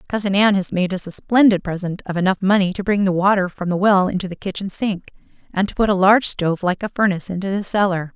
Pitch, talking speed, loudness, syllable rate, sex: 190 Hz, 250 wpm, -19 LUFS, 6.5 syllables/s, female